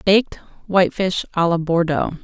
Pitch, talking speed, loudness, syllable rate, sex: 180 Hz, 160 wpm, -19 LUFS, 5.6 syllables/s, female